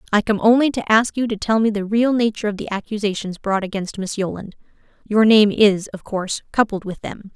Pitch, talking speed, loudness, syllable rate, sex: 210 Hz, 220 wpm, -19 LUFS, 5.7 syllables/s, female